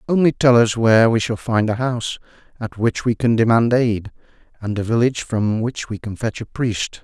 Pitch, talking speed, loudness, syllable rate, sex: 115 Hz, 215 wpm, -18 LUFS, 5.2 syllables/s, male